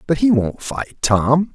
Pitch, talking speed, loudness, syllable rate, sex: 145 Hz, 195 wpm, -18 LUFS, 3.6 syllables/s, male